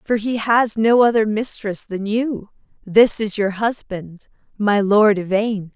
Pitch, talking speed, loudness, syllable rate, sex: 210 Hz, 155 wpm, -18 LUFS, 3.8 syllables/s, female